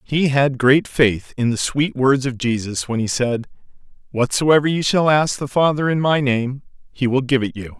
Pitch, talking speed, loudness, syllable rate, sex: 135 Hz, 210 wpm, -18 LUFS, 4.6 syllables/s, male